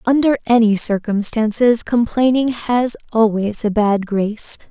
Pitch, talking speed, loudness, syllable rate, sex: 225 Hz, 115 wpm, -16 LUFS, 4.2 syllables/s, female